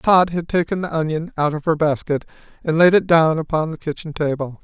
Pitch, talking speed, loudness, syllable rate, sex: 160 Hz, 220 wpm, -19 LUFS, 5.5 syllables/s, male